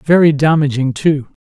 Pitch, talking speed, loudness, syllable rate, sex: 145 Hz, 125 wpm, -13 LUFS, 5.0 syllables/s, male